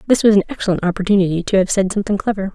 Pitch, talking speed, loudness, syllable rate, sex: 195 Hz, 235 wpm, -17 LUFS, 8.1 syllables/s, female